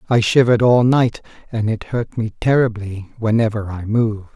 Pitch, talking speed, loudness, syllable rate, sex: 110 Hz, 165 wpm, -18 LUFS, 5.1 syllables/s, male